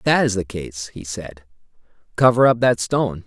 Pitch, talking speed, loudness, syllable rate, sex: 105 Hz, 200 wpm, -19 LUFS, 5.2 syllables/s, male